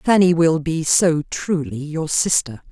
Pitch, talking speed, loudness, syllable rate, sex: 160 Hz, 155 wpm, -18 LUFS, 3.9 syllables/s, female